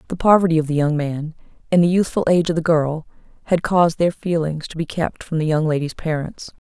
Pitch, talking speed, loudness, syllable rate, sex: 160 Hz, 225 wpm, -19 LUFS, 6.0 syllables/s, female